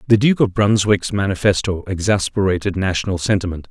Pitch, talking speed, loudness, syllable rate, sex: 100 Hz, 130 wpm, -18 LUFS, 5.8 syllables/s, male